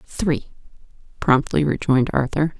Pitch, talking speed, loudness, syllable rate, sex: 145 Hz, 95 wpm, -20 LUFS, 4.8 syllables/s, female